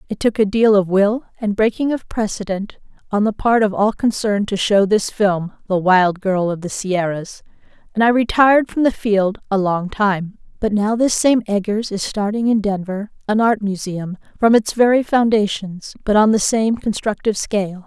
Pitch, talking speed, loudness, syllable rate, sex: 210 Hz, 190 wpm, -17 LUFS, 4.8 syllables/s, female